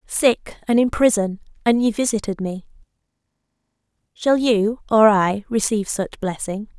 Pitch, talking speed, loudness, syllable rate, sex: 215 Hz, 135 wpm, -20 LUFS, 4.4 syllables/s, female